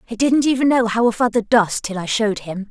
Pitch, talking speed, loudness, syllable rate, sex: 225 Hz, 265 wpm, -18 LUFS, 5.8 syllables/s, female